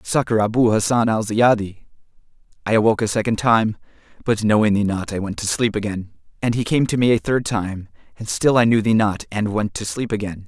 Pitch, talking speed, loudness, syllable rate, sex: 110 Hz, 220 wpm, -19 LUFS, 5.7 syllables/s, male